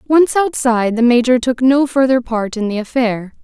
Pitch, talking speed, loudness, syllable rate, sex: 245 Hz, 190 wpm, -15 LUFS, 4.9 syllables/s, female